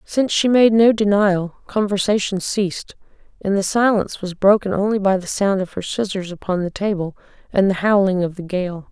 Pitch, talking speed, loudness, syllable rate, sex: 195 Hz, 190 wpm, -19 LUFS, 5.3 syllables/s, female